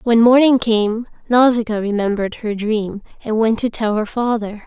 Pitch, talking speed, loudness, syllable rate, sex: 225 Hz, 165 wpm, -17 LUFS, 4.8 syllables/s, female